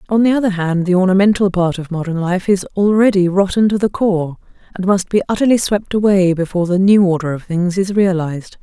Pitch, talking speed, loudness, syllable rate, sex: 190 Hz, 210 wpm, -15 LUFS, 5.8 syllables/s, female